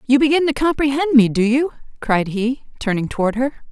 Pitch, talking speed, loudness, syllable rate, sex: 255 Hz, 195 wpm, -18 LUFS, 5.6 syllables/s, female